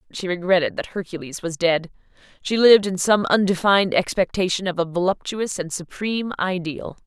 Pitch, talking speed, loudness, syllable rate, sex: 185 Hz, 155 wpm, -21 LUFS, 5.5 syllables/s, female